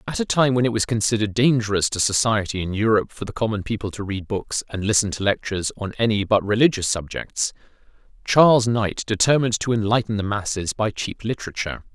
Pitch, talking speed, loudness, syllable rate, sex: 110 Hz, 190 wpm, -21 LUFS, 6.2 syllables/s, male